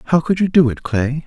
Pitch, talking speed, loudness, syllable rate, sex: 150 Hz, 285 wpm, -16 LUFS, 5.8 syllables/s, male